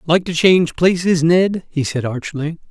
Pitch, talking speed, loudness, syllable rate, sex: 165 Hz, 180 wpm, -16 LUFS, 4.5 syllables/s, male